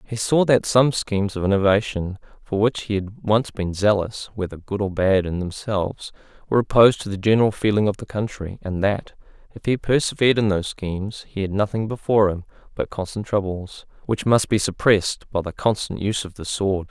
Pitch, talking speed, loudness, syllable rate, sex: 105 Hz, 200 wpm, -21 LUFS, 5.6 syllables/s, male